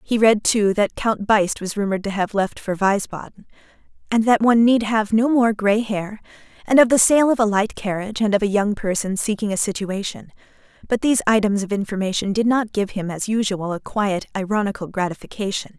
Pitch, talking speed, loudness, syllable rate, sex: 210 Hz, 200 wpm, -20 LUFS, 5.6 syllables/s, female